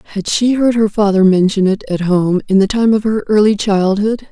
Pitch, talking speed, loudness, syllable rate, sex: 205 Hz, 225 wpm, -13 LUFS, 5.2 syllables/s, female